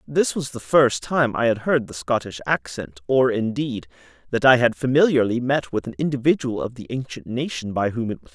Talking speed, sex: 215 wpm, male